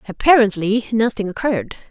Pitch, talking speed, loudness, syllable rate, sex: 225 Hz, 95 wpm, -17 LUFS, 5.8 syllables/s, female